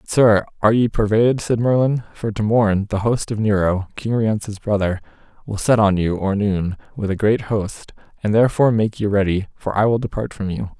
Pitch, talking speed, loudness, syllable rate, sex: 105 Hz, 210 wpm, -19 LUFS, 5.3 syllables/s, male